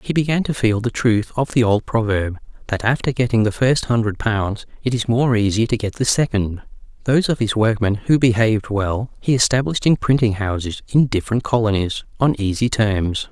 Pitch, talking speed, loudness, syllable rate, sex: 115 Hz, 195 wpm, -19 LUFS, 5.3 syllables/s, male